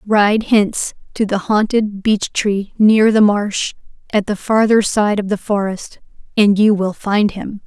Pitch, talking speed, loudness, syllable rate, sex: 205 Hz, 165 wpm, -16 LUFS, 4.0 syllables/s, female